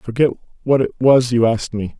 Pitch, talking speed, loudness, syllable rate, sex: 120 Hz, 240 wpm, -17 LUFS, 6.7 syllables/s, male